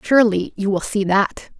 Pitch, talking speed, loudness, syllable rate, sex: 205 Hz, 190 wpm, -19 LUFS, 4.9 syllables/s, female